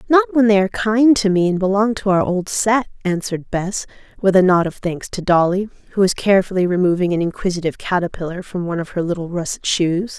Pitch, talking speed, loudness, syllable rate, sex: 190 Hz, 210 wpm, -18 LUFS, 6.1 syllables/s, female